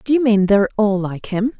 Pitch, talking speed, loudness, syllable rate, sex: 215 Hz, 265 wpm, -17 LUFS, 5.8 syllables/s, female